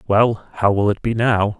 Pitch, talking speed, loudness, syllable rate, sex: 105 Hz, 225 wpm, -18 LUFS, 4.2 syllables/s, male